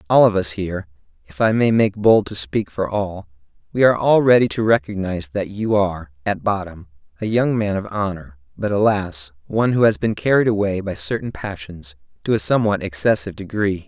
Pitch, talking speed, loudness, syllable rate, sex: 100 Hz, 195 wpm, -19 LUFS, 5.6 syllables/s, male